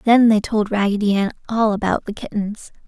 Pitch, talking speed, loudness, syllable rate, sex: 210 Hz, 190 wpm, -19 LUFS, 5.3 syllables/s, female